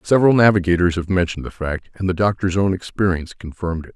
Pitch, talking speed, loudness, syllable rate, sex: 90 Hz, 195 wpm, -19 LUFS, 6.8 syllables/s, male